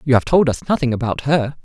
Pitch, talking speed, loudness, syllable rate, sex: 135 Hz, 255 wpm, -17 LUFS, 6.3 syllables/s, male